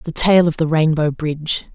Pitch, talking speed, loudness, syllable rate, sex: 160 Hz, 205 wpm, -17 LUFS, 5.1 syllables/s, female